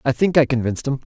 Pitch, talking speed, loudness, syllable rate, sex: 130 Hz, 270 wpm, -19 LUFS, 7.5 syllables/s, male